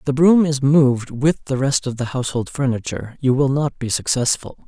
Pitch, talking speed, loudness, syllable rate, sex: 135 Hz, 220 wpm, -19 LUFS, 5.6 syllables/s, male